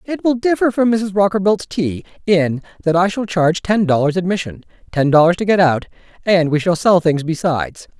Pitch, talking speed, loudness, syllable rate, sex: 180 Hz, 195 wpm, -16 LUFS, 5.4 syllables/s, male